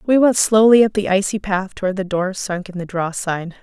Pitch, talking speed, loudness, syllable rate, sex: 195 Hz, 230 wpm, -17 LUFS, 5.6 syllables/s, female